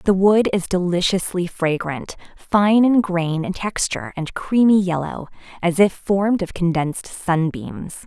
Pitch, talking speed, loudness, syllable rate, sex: 180 Hz, 140 wpm, -19 LUFS, 4.2 syllables/s, female